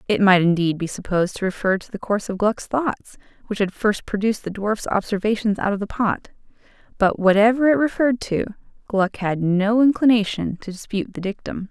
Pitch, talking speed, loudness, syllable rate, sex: 210 Hz, 190 wpm, -21 LUFS, 5.6 syllables/s, female